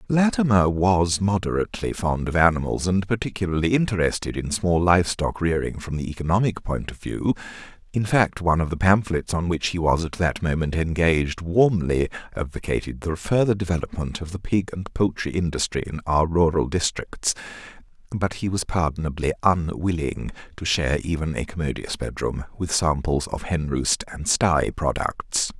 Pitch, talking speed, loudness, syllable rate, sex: 85 Hz, 155 wpm, -23 LUFS, 5.1 syllables/s, male